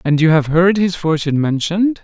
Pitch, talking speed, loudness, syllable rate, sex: 170 Hz, 205 wpm, -15 LUFS, 5.7 syllables/s, male